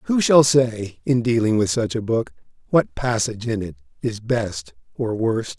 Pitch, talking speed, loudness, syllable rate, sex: 115 Hz, 185 wpm, -21 LUFS, 4.3 syllables/s, male